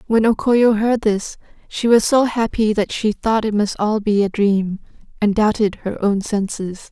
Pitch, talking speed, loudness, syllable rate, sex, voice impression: 210 Hz, 200 wpm, -18 LUFS, 4.3 syllables/s, female, feminine, slightly adult-like, intellectual, calm, sweet, slightly kind